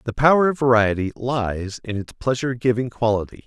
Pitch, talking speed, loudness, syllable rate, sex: 120 Hz, 175 wpm, -21 LUFS, 5.5 syllables/s, male